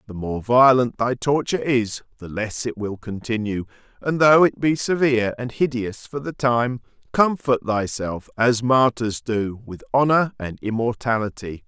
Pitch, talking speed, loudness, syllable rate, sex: 120 Hz, 155 wpm, -21 LUFS, 4.5 syllables/s, male